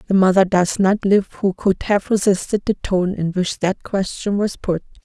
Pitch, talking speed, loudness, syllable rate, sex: 190 Hz, 200 wpm, -19 LUFS, 4.7 syllables/s, female